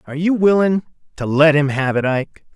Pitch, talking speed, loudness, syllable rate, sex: 155 Hz, 210 wpm, -16 LUFS, 5.1 syllables/s, male